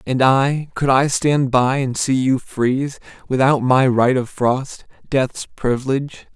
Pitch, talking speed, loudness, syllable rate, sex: 130 Hz, 160 wpm, -18 LUFS, 3.9 syllables/s, male